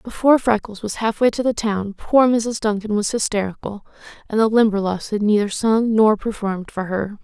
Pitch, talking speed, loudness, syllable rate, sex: 215 Hz, 185 wpm, -19 LUFS, 5.2 syllables/s, female